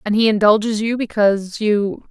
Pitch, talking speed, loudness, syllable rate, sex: 215 Hz, 170 wpm, -17 LUFS, 5.0 syllables/s, female